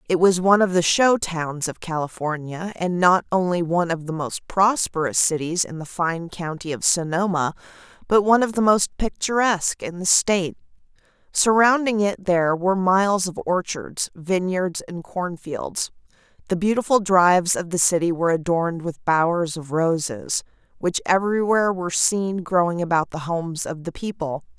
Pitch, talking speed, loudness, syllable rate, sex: 180 Hz, 165 wpm, -21 LUFS, 5.0 syllables/s, female